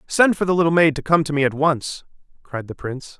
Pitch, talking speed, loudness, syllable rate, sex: 155 Hz, 265 wpm, -19 LUFS, 6.0 syllables/s, male